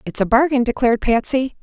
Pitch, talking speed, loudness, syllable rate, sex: 245 Hz, 185 wpm, -17 LUFS, 6.1 syllables/s, female